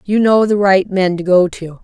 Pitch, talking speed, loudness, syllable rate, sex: 190 Hz, 260 wpm, -13 LUFS, 4.7 syllables/s, female